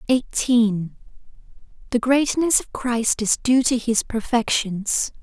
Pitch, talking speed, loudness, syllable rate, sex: 235 Hz, 115 wpm, -20 LUFS, 3.5 syllables/s, female